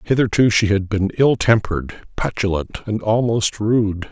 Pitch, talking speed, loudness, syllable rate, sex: 110 Hz, 145 wpm, -18 LUFS, 4.6 syllables/s, male